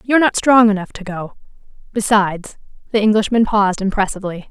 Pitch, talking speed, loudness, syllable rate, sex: 210 Hz, 145 wpm, -16 LUFS, 6.3 syllables/s, female